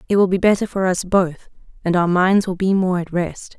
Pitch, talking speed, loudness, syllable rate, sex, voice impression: 185 Hz, 250 wpm, -18 LUFS, 5.2 syllables/s, female, very feminine, adult-like, slightly refreshing, sincere, slightly friendly